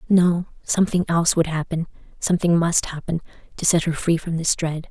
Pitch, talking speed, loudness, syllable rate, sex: 165 Hz, 160 wpm, -21 LUFS, 5.7 syllables/s, female